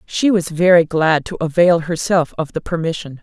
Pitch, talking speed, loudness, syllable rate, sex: 165 Hz, 185 wpm, -16 LUFS, 4.9 syllables/s, female